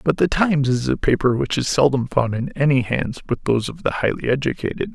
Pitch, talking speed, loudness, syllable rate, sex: 140 Hz, 230 wpm, -20 LUFS, 5.9 syllables/s, male